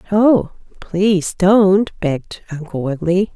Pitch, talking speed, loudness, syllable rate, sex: 185 Hz, 105 wpm, -16 LUFS, 4.0 syllables/s, female